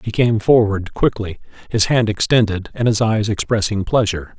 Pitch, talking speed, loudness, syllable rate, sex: 110 Hz, 165 wpm, -17 LUFS, 5.1 syllables/s, male